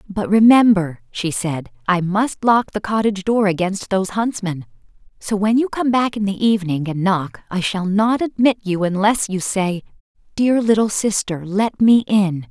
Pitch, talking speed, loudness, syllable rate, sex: 200 Hz, 180 wpm, -18 LUFS, 4.6 syllables/s, female